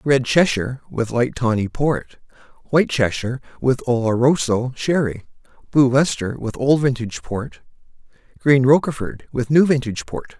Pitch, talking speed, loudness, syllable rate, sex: 130 Hz, 135 wpm, -19 LUFS, 5.0 syllables/s, male